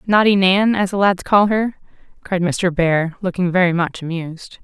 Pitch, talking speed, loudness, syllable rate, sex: 185 Hz, 180 wpm, -17 LUFS, 4.7 syllables/s, female